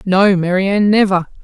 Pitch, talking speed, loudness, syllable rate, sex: 195 Hz, 125 wpm, -13 LUFS, 4.9 syllables/s, female